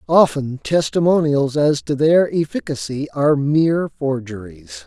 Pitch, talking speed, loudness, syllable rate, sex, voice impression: 145 Hz, 110 wpm, -18 LUFS, 4.3 syllables/s, male, masculine, middle-aged, slightly raspy, slightly refreshing, friendly, slightly reassuring